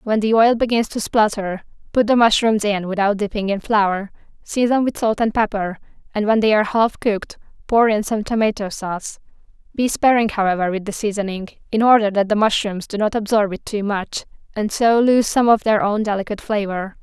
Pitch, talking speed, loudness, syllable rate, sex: 210 Hz, 195 wpm, -18 LUFS, 5.5 syllables/s, female